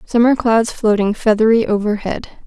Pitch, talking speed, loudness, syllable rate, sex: 220 Hz, 120 wpm, -15 LUFS, 5.0 syllables/s, female